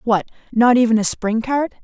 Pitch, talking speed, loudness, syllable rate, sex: 235 Hz, 195 wpm, -17 LUFS, 5.1 syllables/s, female